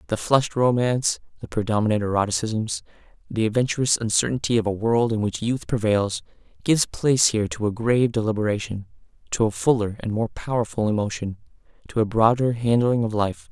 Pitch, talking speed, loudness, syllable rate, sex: 110 Hz, 160 wpm, -23 LUFS, 5.9 syllables/s, male